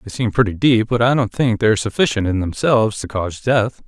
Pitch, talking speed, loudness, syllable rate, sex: 110 Hz, 230 wpm, -17 LUFS, 5.9 syllables/s, male